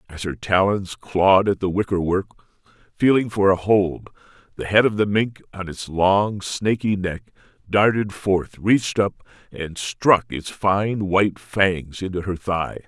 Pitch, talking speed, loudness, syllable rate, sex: 100 Hz, 160 wpm, -21 LUFS, 4.1 syllables/s, male